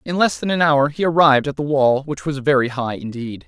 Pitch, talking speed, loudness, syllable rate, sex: 140 Hz, 260 wpm, -18 LUFS, 5.7 syllables/s, male